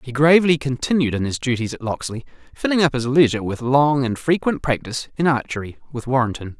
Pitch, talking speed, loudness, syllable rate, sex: 135 Hz, 190 wpm, -20 LUFS, 6.2 syllables/s, male